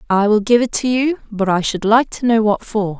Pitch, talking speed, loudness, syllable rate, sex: 220 Hz, 280 wpm, -16 LUFS, 5.2 syllables/s, female